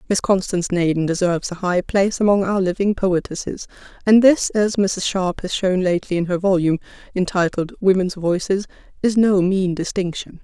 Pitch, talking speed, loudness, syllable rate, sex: 185 Hz, 165 wpm, -19 LUFS, 5.4 syllables/s, female